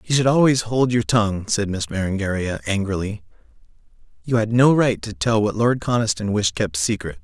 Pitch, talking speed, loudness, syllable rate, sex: 105 Hz, 185 wpm, -20 LUFS, 5.3 syllables/s, male